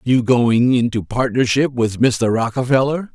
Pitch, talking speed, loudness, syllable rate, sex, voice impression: 125 Hz, 135 wpm, -17 LUFS, 4.3 syllables/s, male, masculine, middle-aged, tensed, powerful, bright, halting, friendly, unique, slightly wild, lively, intense